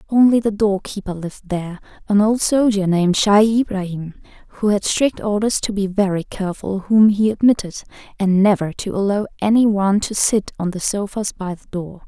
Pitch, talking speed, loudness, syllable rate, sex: 200 Hz, 185 wpm, -18 LUFS, 5.4 syllables/s, female